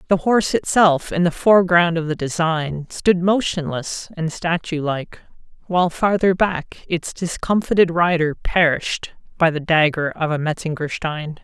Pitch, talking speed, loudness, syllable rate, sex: 170 Hz, 135 wpm, -19 LUFS, 4.6 syllables/s, female